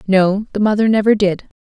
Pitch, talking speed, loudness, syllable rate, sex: 205 Hz, 185 wpm, -15 LUFS, 5.4 syllables/s, female